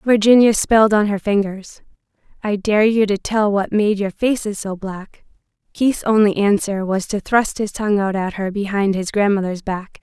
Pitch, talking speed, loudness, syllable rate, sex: 205 Hz, 185 wpm, -18 LUFS, 4.8 syllables/s, female